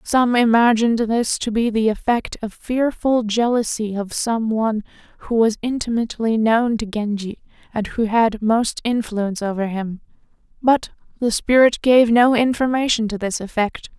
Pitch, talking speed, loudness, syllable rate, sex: 225 Hz, 150 wpm, -19 LUFS, 4.6 syllables/s, female